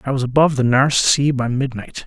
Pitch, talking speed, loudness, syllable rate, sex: 130 Hz, 230 wpm, -17 LUFS, 6.2 syllables/s, male